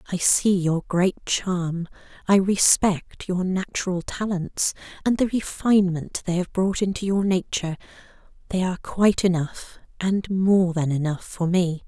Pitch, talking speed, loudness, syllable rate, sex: 185 Hz, 140 wpm, -23 LUFS, 4.4 syllables/s, female